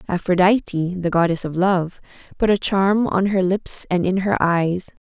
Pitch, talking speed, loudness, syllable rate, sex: 185 Hz, 175 wpm, -19 LUFS, 4.4 syllables/s, female